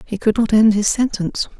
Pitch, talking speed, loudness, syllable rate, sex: 210 Hz, 225 wpm, -17 LUFS, 5.6 syllables/s, female